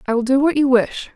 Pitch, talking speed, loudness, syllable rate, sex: 260 Hz, 310 wpm, -17 LUFS, 6.3 syllables/s, female